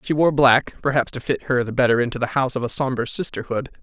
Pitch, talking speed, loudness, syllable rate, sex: 130 Hz, 235 wpm, -20 LUFS, 6.4 syllables/s, male